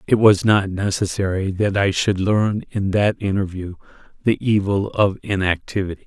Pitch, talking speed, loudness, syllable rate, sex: 100 Hz, 150 wpm, -19 LUFS, 4.7 syllables/s, male